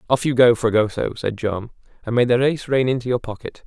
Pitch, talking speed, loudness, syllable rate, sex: 120 Hz, 230 wpm, -19 LUFS, 5.8 syllables/s, male